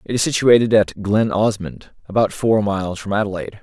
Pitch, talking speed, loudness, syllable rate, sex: 105 Hz, 180 wpm, -18 LUFS, 5.6 syllables/s, male